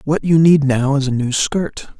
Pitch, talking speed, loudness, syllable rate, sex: 145 Hz, 240 wpm, -15 LUFS, 4.3 syllables/s, male